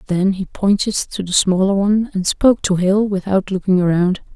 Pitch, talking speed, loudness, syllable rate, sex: 190 Hz, 195 wpm, -17 LUFS, 5.2 syllables/s, female